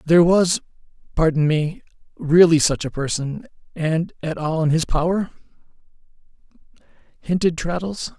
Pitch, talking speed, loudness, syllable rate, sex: 165 Hz, 105 wpm, -20 LUFS, 4.7 syllables/s, male